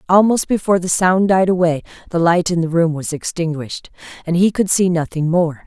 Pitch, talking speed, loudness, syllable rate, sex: 175 Hz, 200 wpm, -16 LUFS, 5.6 syllables/s, female